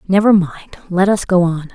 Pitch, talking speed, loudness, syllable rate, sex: 185 Hz, 205 wpm, -15 LUFS, 6.0 syllables/s, female